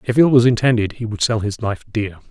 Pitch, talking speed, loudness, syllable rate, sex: 115 Hz, 260 wpm, -18 LUFS, 5.7 syllables/s, male